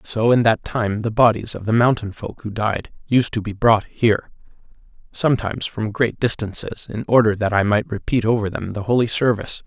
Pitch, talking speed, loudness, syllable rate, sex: 110 Hz, 185 wpm, -20 LUFS, 5.4 syllables/s, male